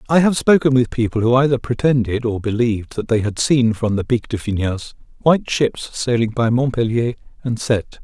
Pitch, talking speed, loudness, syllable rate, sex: 120 Hz, 195 wpm, -18 LUFS, 5.4 syllables/s, male